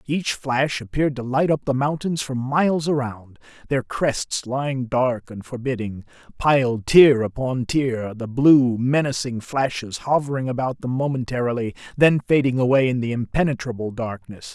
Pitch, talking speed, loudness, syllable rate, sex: 130 Hz, 150 wpm, -21 LUFS, 4.7 syllables/s, male